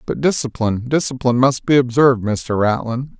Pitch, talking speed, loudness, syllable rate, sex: 125 Hz, 150 wpm, -17 LUFS, 5.5 syllables/s, male